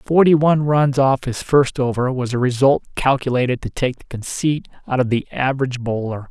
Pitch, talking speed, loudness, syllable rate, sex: 130 Hz, 190 wpm, -18 LUFS, 5.4 syllables/s, male